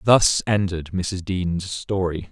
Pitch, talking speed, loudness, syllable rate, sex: 95 Hz, 130 wpm, -22 LUFS, 3.3 syllables/s, male